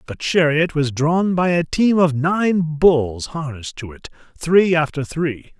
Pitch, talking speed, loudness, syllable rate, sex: 160 Hz, 170 wpm, -18 LUFS, 4.0 syllables/s, male